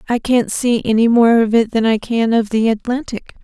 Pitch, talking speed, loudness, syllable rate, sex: 230 Hz, 225 wpm, -15 LUFS, 5.1 syllables/s, female